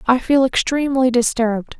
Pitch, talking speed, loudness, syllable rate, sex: 250 Hz, 135 wpm, -17 LUFS, 5.5 syllables/s, female